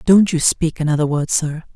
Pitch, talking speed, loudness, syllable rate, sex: 160 Hz, 205 wpm, -17 LUFS, 5.1 syllables/s, male